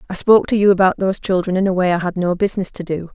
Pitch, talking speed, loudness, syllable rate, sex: 190 Hz, 305 wpm, -17 LUFS, 7.6 syllables/s, female